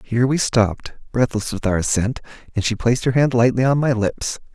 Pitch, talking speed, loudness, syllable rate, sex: 120 Hz, 210 wpm, -19 LUFS, 5.7 syllables/s, male